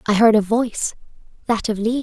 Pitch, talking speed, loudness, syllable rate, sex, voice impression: 220 Hz, 210 wpm, -19 LUFS, 6.0 syllables/s, female, feminine, slightly young, slightly relaxed, powerful, bright, slightly soft, cute, slightly refreshing, friendly, reassuring, lively, slightly kind